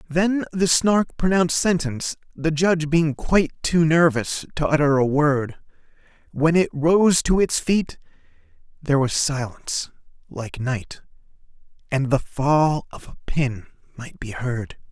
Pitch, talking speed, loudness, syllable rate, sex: 150 Hz, 140 wpm, -21 LUFS, 4.2 syllables/s, male